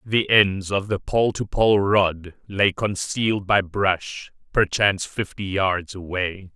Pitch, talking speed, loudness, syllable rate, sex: 100 Hz, 145 wpm, -21 LUFS, 3.6 syllables/s, male